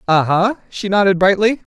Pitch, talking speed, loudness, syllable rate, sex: 195 Hz, 170 wpm, -15 LUFS, 5.1 syllables/s, female